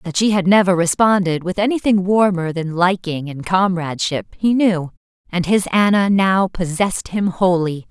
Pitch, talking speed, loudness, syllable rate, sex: 185 Hz, 160 wpm, -17 LUFS, 4.8 syllables/s, female